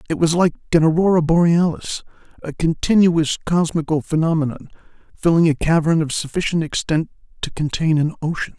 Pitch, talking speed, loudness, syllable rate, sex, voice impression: 160 Hz, 140 wpm, -18 LUFS, 5.6 syllables/s, male, masculine, very adult-like, slightly soft, slightly cool, sincere, calm, kind